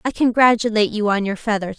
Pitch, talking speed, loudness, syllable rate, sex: 220 Hz, 200 wpm, -18 LUFS, 6.5 syllables/s, female